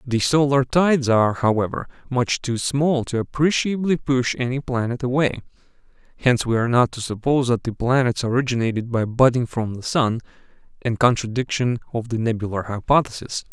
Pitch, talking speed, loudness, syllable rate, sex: 125 Hz, 155 wpm, -21 LUFS, 5.5 syllables/s, male